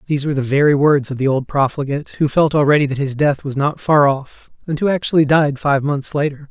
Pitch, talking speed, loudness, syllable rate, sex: 145 Hz, 240 wpm, -16 LUFS, 6.0 syllables/s, male